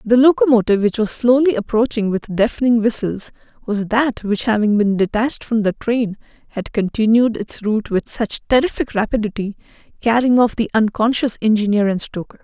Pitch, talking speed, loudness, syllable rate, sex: 225 Hz, 160 wpm, -17 LUFS, 5.5 syllables/s, female